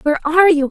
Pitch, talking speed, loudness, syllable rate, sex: 320 Hz, 255 wpm, -13 LUFS, 8.2 syllables/s, female